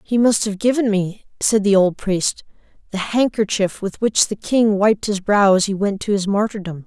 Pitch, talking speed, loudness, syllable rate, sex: 205 Hz, 210 wpm, -18 LUFS, 4.7 syllables/s, female